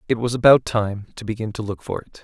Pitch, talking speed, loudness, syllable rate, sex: 110 Hz, 270 wpm, -21 LUFS, 6.1 syllables/s, male